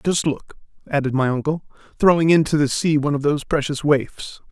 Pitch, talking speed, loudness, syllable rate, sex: 145 Hz, 185 wpm, -19 LUFS, 5.7 syllables/s, male